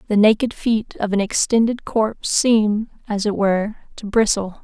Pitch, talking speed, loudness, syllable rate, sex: 215 Hz, 170 wpm, -19 LUFS, 4.7 syllables/s, female